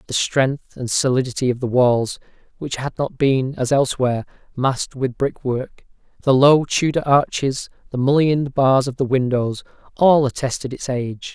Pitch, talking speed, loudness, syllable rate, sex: 130 Hz, 155 wpm, -19 LUFS, 4.8 syllables/s, male